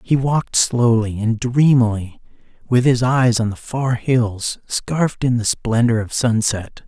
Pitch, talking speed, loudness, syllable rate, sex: 120 Hz, 155 wpm, -18 LUFS, 4.0 syllables/s, male